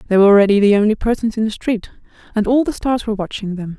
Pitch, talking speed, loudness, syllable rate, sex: 215 Hz, 255 wpm, -16 LUFS, 7.3 syllables/s, female